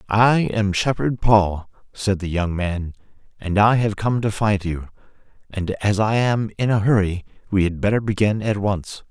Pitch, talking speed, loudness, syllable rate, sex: 105 Hz, 185 wpm, -20 LUFS, 4.4 syllables/s, male